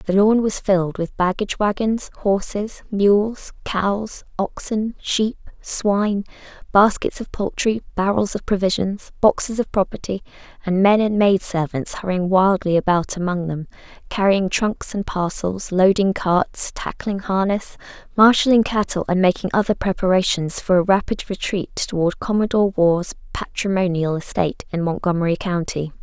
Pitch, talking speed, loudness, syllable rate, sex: 195 Hz, 135 wpm, -20 LUFS, 4.6 syllables/s, female